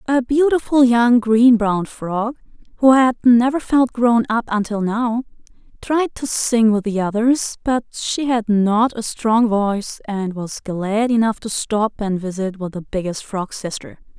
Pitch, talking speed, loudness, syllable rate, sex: 225 Hz, 170 wpm, -18 LUFS, 4.1 syllables/s, female